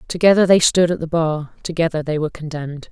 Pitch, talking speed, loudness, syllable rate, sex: 160 Hz, 205 wpm, -18 LUFS, 6.3 syllables/s, female